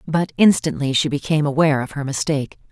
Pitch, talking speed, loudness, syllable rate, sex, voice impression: 150 Hz, 175 wpm, -19 LUFS, 6.5 syllables/s, female, very feminine, very adult-like, intellectual, slightly sweet